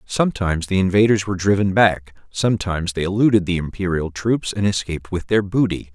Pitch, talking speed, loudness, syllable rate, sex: 95 Hz, 170 wpm, -19 LUFS, 6.0 syllables/s, male